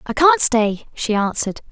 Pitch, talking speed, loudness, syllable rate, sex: 245 Hz, 175 wpm, -17 LUFS, 4.8 syllables/s, female